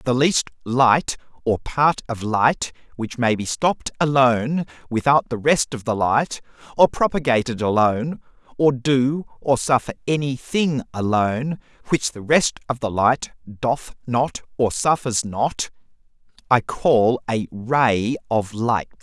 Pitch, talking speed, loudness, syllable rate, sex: 125 Hz, 140 wpm, -21 LUFS, 3.9 syllables/s, male